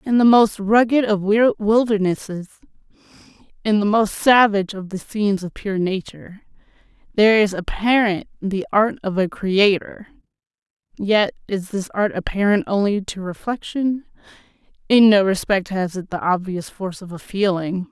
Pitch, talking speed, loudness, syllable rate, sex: 200 Hz, 135 wpm, -19 LUFS, 4.7 syllables/s, female